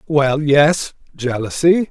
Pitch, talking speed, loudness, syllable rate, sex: 150 Hz, 95 wpm, -16 LUFS, 3.2 syllables/s, male